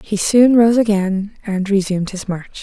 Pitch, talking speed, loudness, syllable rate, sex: 205 Hz, 185 wpm, -16 LUFS, 4.5 syllables/s, female